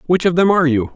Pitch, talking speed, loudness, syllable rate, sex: 165 Hz, 315 wpm, -15 LUFS, 7.6 syllables/s, male